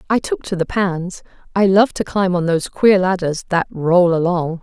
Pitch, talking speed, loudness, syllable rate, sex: 180 Hz, 195 wpm, -17 LUFS, 4.7 syllables/s, female